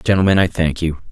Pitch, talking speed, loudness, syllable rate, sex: 85 Hz, 215 wpm, -16 LUFS, 5.9 syllables/s, male